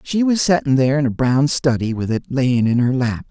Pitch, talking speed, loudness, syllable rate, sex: 135 Hz, 255 wpm, -17 LUFS, 5.4 syllables/s, male